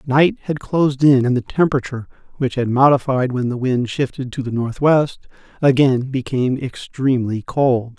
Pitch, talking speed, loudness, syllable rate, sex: 130 Hz, 160 wpm, -18 LUFS, 5.1 syllables/s, male